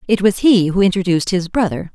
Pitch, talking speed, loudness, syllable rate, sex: 190 Hz, 215 wpm, -15 LUFS, 6.2 syllables/s, female